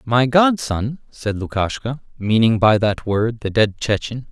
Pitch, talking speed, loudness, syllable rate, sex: 115 Hz, 155 wpm, -19 LUFS, 4.0 syllables/s, male